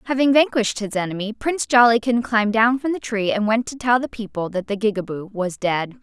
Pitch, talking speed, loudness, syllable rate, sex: 220 Hz, 220 wpm, -20 LUFS, 5.9 syllables/s, female